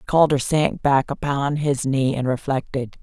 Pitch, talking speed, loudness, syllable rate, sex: 140 Hz, 160 wpm, -21 LUFS, 4.2 syllables/s, female